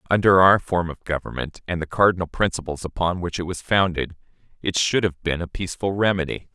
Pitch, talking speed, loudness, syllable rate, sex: 90 Hz, 190 wpm, -22 LUFS, 5.9 syllables/s, male